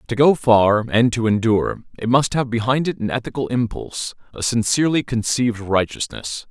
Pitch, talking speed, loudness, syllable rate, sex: 115 Hz, 165 wpm, -19 LUFS, 5.3 syllables/s, male